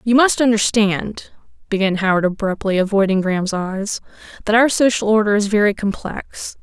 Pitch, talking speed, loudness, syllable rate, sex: 205 Hz, 145 wpm, -17 LUFS, 5.1 syllables/s, female